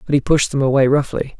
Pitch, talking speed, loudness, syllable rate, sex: 140 Hz, 260 wpm, -16 LUFS, 6.3 syllables/s, male